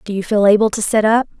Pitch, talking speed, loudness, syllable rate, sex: 210 Hz, 300 wpm, -15 LUFS, 6.6 syllables/s, female